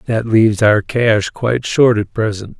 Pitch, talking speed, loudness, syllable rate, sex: 110 Hz, 185 wpm, -14 LUFS, 4.5 syllables/s, male